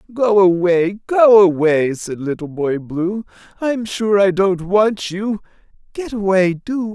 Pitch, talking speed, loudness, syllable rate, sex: 195 Hz, 130 wpm, -16 LUFS, 3.6 syllables/s, male